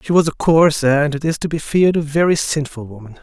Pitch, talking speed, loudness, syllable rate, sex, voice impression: 150 Hz, 260 wpm, -16 LUFS, 6.1 syllables/s, male, very masculine, slightly young, slightly adult-like, thick, tensed, powerful, slightly bright, slightly hard, clear, fluent, cool, intellectual, very refreshing, sincere, calm, friendly, reassuring, slightly unique, slightly elegant, wild, slightly sweet, lively, kind, slightly intense